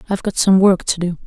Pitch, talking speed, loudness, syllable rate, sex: 185 Hz, 285 wpm, -16 LUFS, 6.9 syllables/s, female